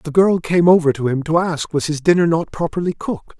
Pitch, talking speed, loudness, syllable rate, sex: 160 Hz, 250 wpm, -17 LUFS, 5.7 syllables/s, male